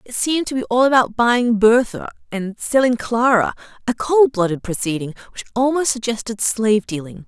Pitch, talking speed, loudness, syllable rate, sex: 230 Hz, 155 wpm, -18 LUFS, 5.2 syllables/s, female